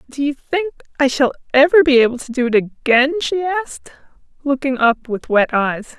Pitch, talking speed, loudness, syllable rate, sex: 275 Hz, 190 wpm, -16 LUFS, 5.0 syllables/s, female